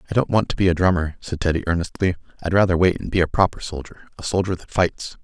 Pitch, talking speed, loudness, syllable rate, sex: 90 Hz, 240 wpm, -21 LUFS, 6.8 syllables/s, male